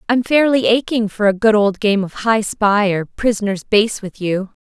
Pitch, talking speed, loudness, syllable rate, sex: 210 Hz, 205 wpm, -16 LUFS, 4.6 syllables/s, female